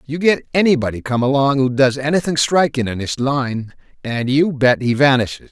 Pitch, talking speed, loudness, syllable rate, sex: 135 Hz, 185 wpm, -17 LUFS, 5.2 syllables/s, male